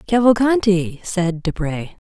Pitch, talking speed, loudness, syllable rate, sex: 195 Hz, 85 wpm, -18 LUFS, 3.9 syllables/s, female